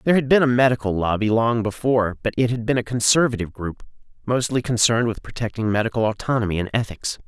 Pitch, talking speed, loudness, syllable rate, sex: 115 Hz, 190 wpm, -21 LUFS, 6.7 syllables/s, male